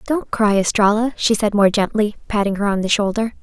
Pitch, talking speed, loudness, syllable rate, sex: 210 Hz, 210 wpm, -18 LUFS, 5.5 syllables/s, female